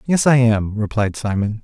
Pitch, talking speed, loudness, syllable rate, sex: 115 Hz, 185 wpm, -18 LUFS, 4.6 syllables/s, male